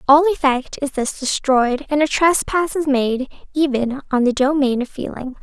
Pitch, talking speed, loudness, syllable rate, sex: 275 Hz, 175 wpm, -18 LUFS, 4.7 syllables/s, female